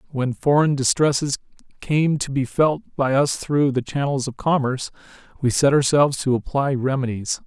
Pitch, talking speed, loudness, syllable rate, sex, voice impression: 135 Hz, 160 wpm, -21 LUFS, 4.9 syllables/s, male, masculine, adult-like, fluent, sincere, slightly calm, reassuring